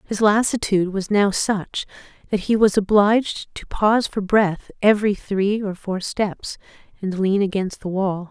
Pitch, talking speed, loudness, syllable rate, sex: 200 Hz, 165 wpm, -20 LUFS, 4.5 syllables/s, female